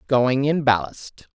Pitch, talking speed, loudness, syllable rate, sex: 135 Hz, 135 wpm, -20 LUFS, 3.6 syllables/s, female